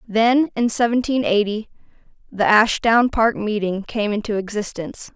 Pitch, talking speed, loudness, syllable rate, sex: 220 Hz, 130 wpm, -19 LUFS, 4.7 syllables/s, female